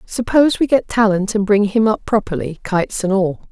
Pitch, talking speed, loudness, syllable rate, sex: 205 Hz, 205 wpm, -16 LUFS, 5.5 syllables/s, female